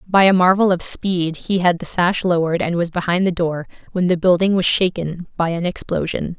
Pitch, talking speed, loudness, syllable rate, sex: 175 Hz, 215 wpm, -18 LUFS, 5.3 syllables/s, female